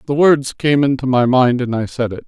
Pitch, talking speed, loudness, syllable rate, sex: 130 Hz, 265 wpm, -15 LUFS, 5.2 syllables/s, male